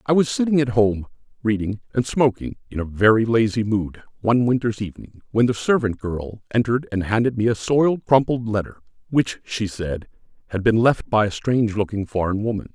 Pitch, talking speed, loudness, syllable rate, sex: 115 Hz, 190 wpm, -21 LUFS, 5.6 syllables/s, male